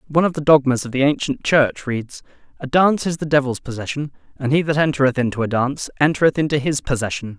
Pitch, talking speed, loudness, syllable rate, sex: 140 Hz, 210 wpm, -19 LUFS, 6.4 syllables/s, male